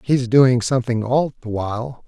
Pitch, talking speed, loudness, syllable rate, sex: 120 Hz, 175 wpm, -19 LUFS, 4.8 syllables/s, male